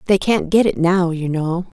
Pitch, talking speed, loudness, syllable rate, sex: 180 Hz, 235 wpm, -17 LUFS, 4.6 syllables/s, female